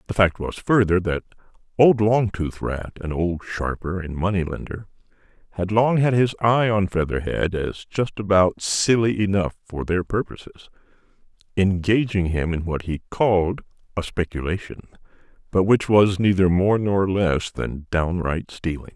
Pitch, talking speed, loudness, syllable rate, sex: 95 Hz, 145 wpm, -22 LUFS, 4.5 syllables/s, male